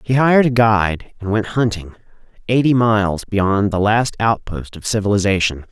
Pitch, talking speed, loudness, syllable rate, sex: 105 Hz, 155 wpm, -17 LUFS, 5.0 syllables/s, male